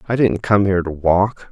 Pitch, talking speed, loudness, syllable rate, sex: 95 Hz, 240 wpm, -17 LUFS, 5.3 syllables/s, male